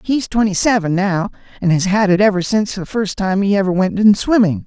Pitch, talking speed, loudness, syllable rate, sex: 195 Hz, 230 wpm, -16 LUFS, 5.6 syllables/s, male